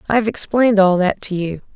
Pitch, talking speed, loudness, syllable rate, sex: 200 Hz, 205 wpm, -17 LUFS, 6.2 syllables/s, female